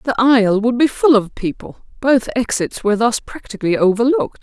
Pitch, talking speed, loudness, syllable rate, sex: 240 Hz, 175 wpm, -16 LUFS, 5.7 syllables/s, female